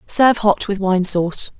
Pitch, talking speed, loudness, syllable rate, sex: 200 Hz, 190 wpm, -17 LUFS, 5.0 syllables/s, female